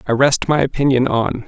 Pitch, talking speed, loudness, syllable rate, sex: 130 Hz, 205 wpm, -16 LUFS, 5.3 syllables/s, male